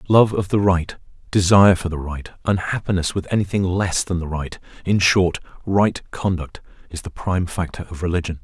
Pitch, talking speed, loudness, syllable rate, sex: 90 Hz, 170 wpm, -20 LUFS, 5.3 syllables/s, male